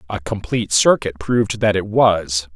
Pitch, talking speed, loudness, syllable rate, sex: 100 Hz, 165 wpm, -18 LUFS, 4.8 syllables/s, male